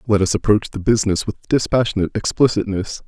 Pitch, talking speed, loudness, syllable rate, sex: 105 Hz, 155 wpm, -18 LUFS, 6.6 syllables/s, male